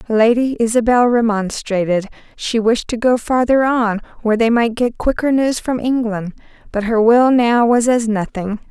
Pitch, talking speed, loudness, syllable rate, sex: 230 Hz, 165 wpm, -16 LUFS, 4.6 syllables/s, female